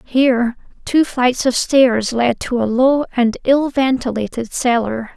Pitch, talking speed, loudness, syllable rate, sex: 250 Hz, 150 wpm, -16 LUFS, 3.9 syllables/s, female